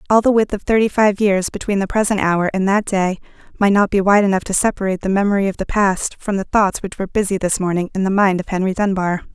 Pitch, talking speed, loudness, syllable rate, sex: 195 Hz, 255 wpm, -17 LUFS, 6.4 syllables/s, female